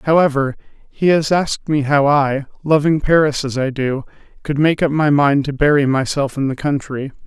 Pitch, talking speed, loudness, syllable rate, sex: 145 Hz, 190 wpm, -16 LUFS, 5.0 syllables/s, male